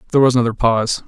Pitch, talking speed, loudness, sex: 120 Hz, 220 wpm, -16 LUFS, male